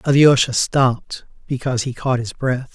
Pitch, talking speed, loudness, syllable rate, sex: 125 Hz, 155 wpm, -18 LUFS, 5.0 syllables/s, male